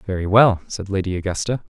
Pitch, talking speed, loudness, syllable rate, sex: 100 Hz, 170 wpm, -20 LUFS, 5.9 syllables/s, male